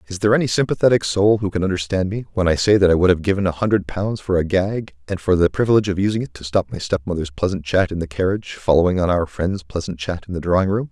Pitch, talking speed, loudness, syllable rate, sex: 95 Hz, 270 wpm, -19 LUFS, 6.8 syllables/s, male